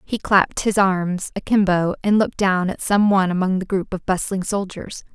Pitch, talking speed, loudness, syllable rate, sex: 190 Hz, 200 wpm, -19 LUFS, 5.1 syllables/s, female